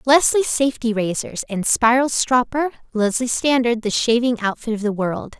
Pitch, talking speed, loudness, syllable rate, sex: 240 Hz, 155 wpm, -19 LUFS, 4.8 syllables/s, female